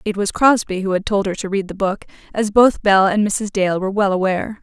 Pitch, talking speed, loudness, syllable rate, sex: 200 Hz, 260 wpm, -17 LUFS, 5.7 syllables/s, female